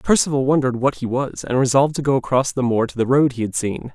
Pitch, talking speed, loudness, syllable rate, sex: 130 Hz, 275 wpm, -19 LUFS, 6.5 syllables/s, male